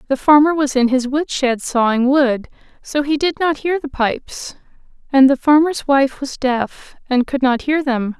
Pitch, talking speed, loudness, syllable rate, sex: 275 Hz, 190 wpm, -16 LUFS, 4.5 syllables/s, female